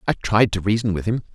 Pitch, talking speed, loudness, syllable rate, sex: 105 Hz, 270 wpm, -20 LUFS, 6.2 syllables/s, male